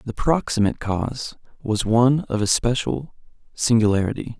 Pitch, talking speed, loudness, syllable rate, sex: 115 Hz, 110 wpm, -21 LUFS, 5.2 syllables/s, male